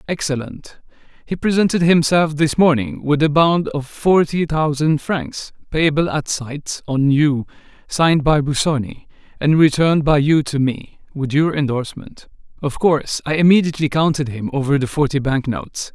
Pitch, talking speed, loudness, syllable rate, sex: 150 Hz, 150 wpm, -17 LUFS, 4.8 syllables/s, male